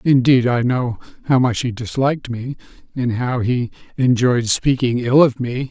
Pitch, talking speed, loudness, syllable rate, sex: 125 Hz, 170 wpm, -18 LUFS, 4.4 syllables/s, male